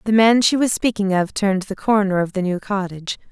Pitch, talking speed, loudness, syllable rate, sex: 200 Hz, 235 wpm, -19 LUFS, 5.9 syllables/s, female